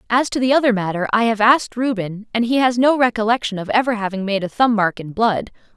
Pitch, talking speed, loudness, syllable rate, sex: 225 Hz, 240 wpm, -18 LUFS, 6.1 syllables/s, female